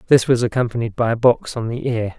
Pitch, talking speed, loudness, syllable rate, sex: 120 Hz, 245 wpm, -19 LUFS, 6.0 syllables/s, male